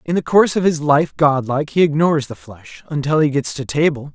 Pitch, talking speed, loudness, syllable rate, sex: 145 Hz, 215 wpm, -17 LUFS, 5.8 syllables/s, male